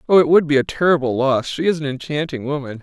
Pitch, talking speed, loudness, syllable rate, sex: 145 Hz, 255 wpm, -18 LUFS, 6.4 syllables/s, male